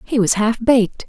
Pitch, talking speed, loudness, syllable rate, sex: 225 Hz, 220 wpm, -16 LUFS, 5.2 syllables/s, female